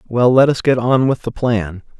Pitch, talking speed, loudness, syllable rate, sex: 120 Hz, 240 wpm, -15 LUFS, 4.7 syllables/s, male